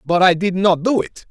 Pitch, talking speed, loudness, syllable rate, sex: 185 Hz, 275 wpm, -16 LUFS, 5.0 syllables/s, male